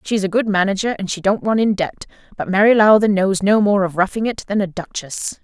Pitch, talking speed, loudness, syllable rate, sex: 200 Hz, 230 wpm, -17 LUFS, 5.8 syllables/s, female